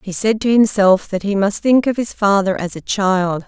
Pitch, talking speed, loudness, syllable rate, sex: 200 Hz, 240 wpm, -16 LUFS, 4.8 syllables/s, female